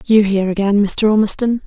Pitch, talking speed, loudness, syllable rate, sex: 205 Hz, 180 wpm, -15 LUFS, 5.9 syllables/s, female